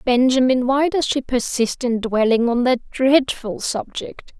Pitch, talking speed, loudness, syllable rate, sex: 250 Hz, 150 wpm, -19 LUFS, 4.1 syllables/s, female